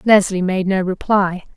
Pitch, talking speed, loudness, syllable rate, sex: 190 Hz, 155 wpm, -17 LUFS, 4.4 syllables/s, female